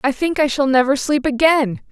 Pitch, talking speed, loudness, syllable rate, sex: 280 Hz, 220 wpm, -16 LUFS, 5.1 syllables/s, female